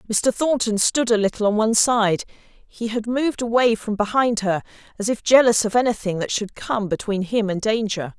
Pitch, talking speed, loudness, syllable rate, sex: 220 Hz, 200 wpm, -20 LUFS, 5.1 syllables/s, female